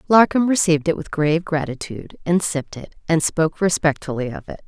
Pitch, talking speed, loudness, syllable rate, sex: 165 Hz, 180 wpm, -20 LUFS, 6.1 syllables/s, female